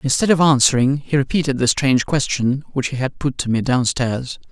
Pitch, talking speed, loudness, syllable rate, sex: 135 Hz, 200 wpm, -18 LUFS, 5.4 syllables/s, male